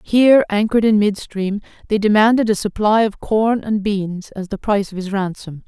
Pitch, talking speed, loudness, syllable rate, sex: 205 Hz, 200 wpm, -17 LUFS, 5.2 syllables/s, female